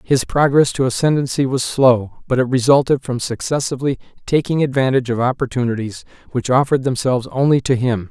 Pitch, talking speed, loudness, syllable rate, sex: 130 Hz, 155 wpm, -17 LUFS, 5.9 syllables/s, male